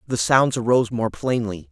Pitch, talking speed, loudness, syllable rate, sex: 115 Hz, 175 wpm, -20 LUFS, 5.1 syllables/s, male